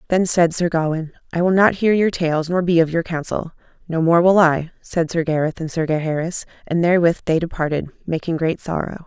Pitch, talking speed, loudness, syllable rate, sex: 165 Hz, 210 wpm, -19 LUFS, 5.5 syllables/s, female